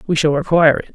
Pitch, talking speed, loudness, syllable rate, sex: 155 Hz, 255 wpm, -15 LUFS, 7.4 syllables/s, male